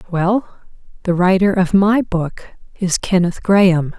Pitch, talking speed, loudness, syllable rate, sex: 185 Hz, 135 wpm, -16 LUFS, 4.1 syllables/s, female